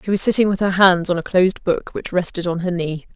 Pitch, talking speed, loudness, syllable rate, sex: 180 Hz, 285 wpm, -18 LUFS, 6.0 syllables/s, female